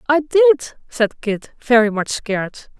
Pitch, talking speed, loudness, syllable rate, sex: 250 Hz, 150 wpm, -17 LUFS, 3.8 syllables/s, female